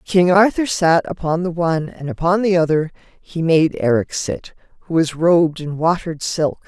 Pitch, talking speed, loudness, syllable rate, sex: 165 Hz, 180 wpm, -17 LUFS, 4.9 syllables/s, female